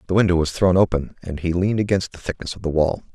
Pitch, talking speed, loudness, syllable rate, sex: 90 Hz, 265 wpm, -21 LUFS, 6.8 syllables/s, male